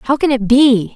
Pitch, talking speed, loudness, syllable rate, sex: 250 Hz, 250 wpm, -12 LUFS, 4.4 syllables/s, female